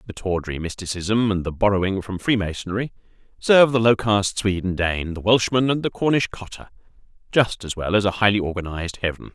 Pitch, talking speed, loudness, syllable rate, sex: 100 Hz, 185 wpm, -21 LUFS, 5.9 syllables/s, male